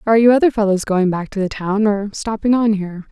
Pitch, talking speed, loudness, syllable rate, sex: 205 Hz, 250 wpm, -17 LUFS, 6.1 syllables/s, female